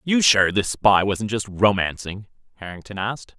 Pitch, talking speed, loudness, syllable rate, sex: 105 Hz, 160 wpm, -20 LUFS, 4.7 syllables/s, male